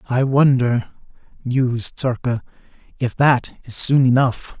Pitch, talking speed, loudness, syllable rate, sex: 125 Hz, 115 wpm, -18 LUFS, 4.1 syllables/s, male